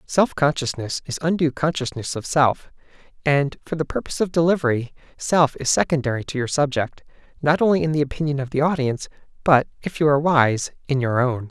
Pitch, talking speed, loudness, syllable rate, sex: 140 Hz, 185 wpm, -21 LUFS, 5.9 syllables/s, male